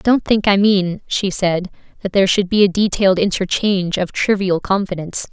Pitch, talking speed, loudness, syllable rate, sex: 190 Hz, 180 wpm, -16 LUFS, 5.4 syllables/s, female